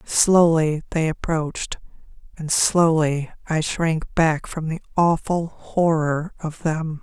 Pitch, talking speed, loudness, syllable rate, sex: 160 Hz, 120 wpm, -21 LUFS, 3.5 syllables/s, female